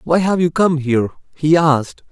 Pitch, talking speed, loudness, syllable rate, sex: 155 Hz, 200 wpm, -16 LUFS, 5.3 syllables/s, male